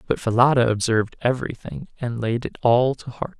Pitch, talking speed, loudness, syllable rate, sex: 120 Hz, 175 wpm, -21 LUFS, 5.6 syllables/s, male